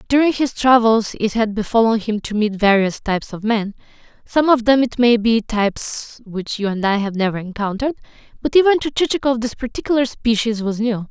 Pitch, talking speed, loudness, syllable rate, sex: 225 Hz, 190 wpm, -18 LUFS, 5.5 syllables/s, female